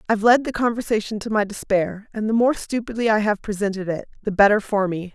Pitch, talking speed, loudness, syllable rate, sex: 210 Hz, 220 wpm, -21 LUFS, 6.1 syllables/s, female